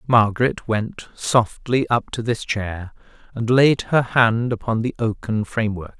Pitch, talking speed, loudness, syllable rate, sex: 115 Hz, 150 wpm, -20 LUFS, 4.1 syllables/s, male